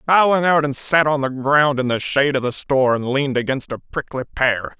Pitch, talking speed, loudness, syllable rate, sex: 140 Hz, 250 wpm, -18 LUFS, 5.7 syllables/s, male